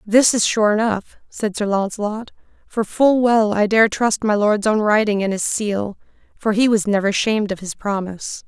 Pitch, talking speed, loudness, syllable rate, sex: 210 Hz, 200 wpm, -18 LUFS, 4.8 syllables/s, female